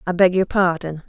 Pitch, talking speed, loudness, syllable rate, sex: 175 Hz, 220 wpm, -18 LUFS, 5.3 syllables/s, female